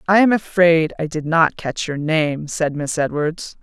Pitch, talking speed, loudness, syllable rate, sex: 160 Hz, 200 wpm, -18 LUFS, 4.1 syllables/s, female